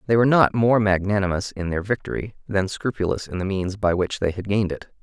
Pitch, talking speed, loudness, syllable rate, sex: 100 Hz, 225 wpm, -22 LUFS, 6.0 syllables/s, male